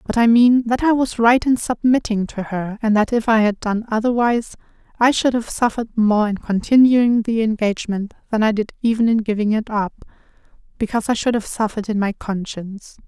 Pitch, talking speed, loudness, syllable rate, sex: 225 Hz, 195 wpm, -18 LUFS, 5.6 syllables/s, female